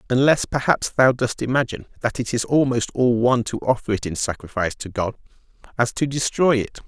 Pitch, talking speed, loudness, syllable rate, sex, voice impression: 120 Hz, 190 wpm, -21 LUFS, 5.9 syllables/s, male, very masculine, very adult-like, slightly thick, cool, sincere, slightly kind